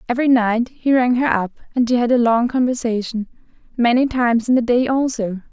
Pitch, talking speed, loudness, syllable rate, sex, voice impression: 240 Hz, 195 wpm, -18 LUFS, 5.7 syllables/s, female, feminine, adult-like, relaxed, weak, soft, slightly muffled, cute, refreshing, calm, friendly, reassuring, elegant, kind, modest